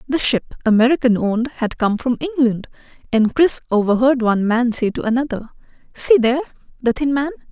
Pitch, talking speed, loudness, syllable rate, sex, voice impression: 250 Hz, 170 wpm, -18 LUFS, 5.8 syllables/s, female, feminine, slightly adult-like, slightly soft, fluent, slightly friendly, slightly reassuring, kind